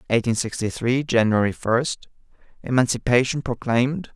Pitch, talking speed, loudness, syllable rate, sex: 120 Hz, 85 wpm, -22 LUFS, 5.0 syllables/s, male